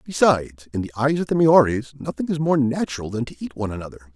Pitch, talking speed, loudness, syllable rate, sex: 130 Hz, 230 wpm, -21 LUFS, 6.5 syllables/s, male